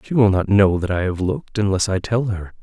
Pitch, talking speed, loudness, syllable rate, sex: 100 Hz, 275 wpm, -19 LUFS, 5.7 syllables/s, male